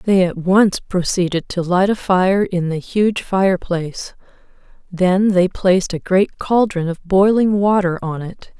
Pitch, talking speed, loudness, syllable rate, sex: 185 Hz, 160 wpm, -17 LUFS, 4.1 syllables/s, female